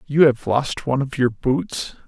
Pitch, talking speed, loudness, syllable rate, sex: 135 Hz, 200 wpm, -20 LUFS, 4.3 syllables/s, male